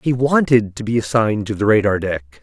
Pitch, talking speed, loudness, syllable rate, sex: 110 Hz, 220 wpm, -17 LUFS, 5.6 syllables/s, male